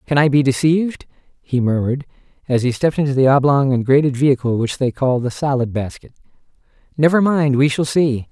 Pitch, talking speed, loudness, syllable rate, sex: 135 Hz, 190 wpm, -17 LUFS, 5.9 syllables/s, male